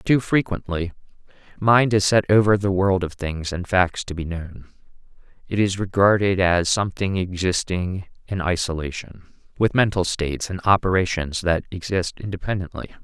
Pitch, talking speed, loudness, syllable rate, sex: 95 Hz, 145 wpm, -21 LUFS, 4.9 syllables/s, male